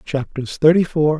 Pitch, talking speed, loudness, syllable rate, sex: 150 Hz, 150 wpm, -17 LUFS, 4.5 syllables/s, male